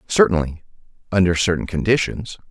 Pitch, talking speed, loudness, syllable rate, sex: 90 Hz, 95 wpm, -19 LUFS, 5.7 syllables/s, male